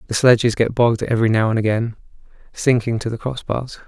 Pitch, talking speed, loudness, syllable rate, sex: 115 Hz, 185 wpm, -19 LUFS, 6.2 syllables/s, male